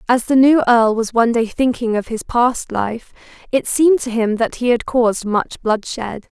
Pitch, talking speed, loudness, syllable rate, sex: 235 Hz, 205 wpm, -17 LUFS, 4.7 syllables/s, female